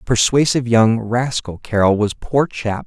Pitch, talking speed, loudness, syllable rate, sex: 115 Hz, 125 wpm, -17 LUFS, 4.4 syllables/s, male